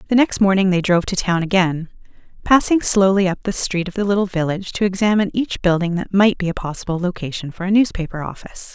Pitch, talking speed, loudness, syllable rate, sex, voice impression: 190 Hz, 215 wpm, -18 LUFS, 6.4 syllables/s, female, feminine, slightly gender-neutral, very adult-like, slightly middle-aged, slightly thin, slightly tensed, slightly weak, slightly bright, hard, clear, fluent, slightly raspy, slightly cool, very intellectual, slightly refreshing, sincere, calm, slightly elegant, kind, modest